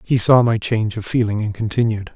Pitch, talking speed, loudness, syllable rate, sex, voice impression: 110 Hz, 225 wpm, -18 LUFS, 5.9 syllables/s, male, very masculine, slightly old, thick, very relaxed, weak, dark, hard, muffled, slightly halting, slightly raspy, cool, intellectual, slightly refreshing, very sincere, very calm, very mature, slightly friendly, very reassuring, very unique, slightly elegant, very wild, sweet, slightly lively, slightly strict, slightly modest